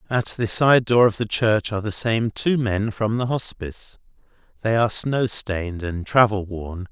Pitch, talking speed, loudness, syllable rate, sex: 110 Hz, 190 wpm, -21 LUFS, 4.6 syllables/s, male